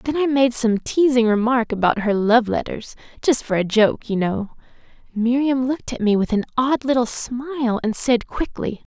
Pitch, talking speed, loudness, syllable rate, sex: 240 Hz, 180 wpm, -20 LUFS, 4.7 syllables/s, female